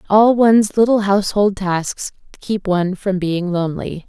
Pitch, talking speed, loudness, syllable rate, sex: 195 Hz, 145 wpm, -16 LUFS, 4.7 syllables/s, female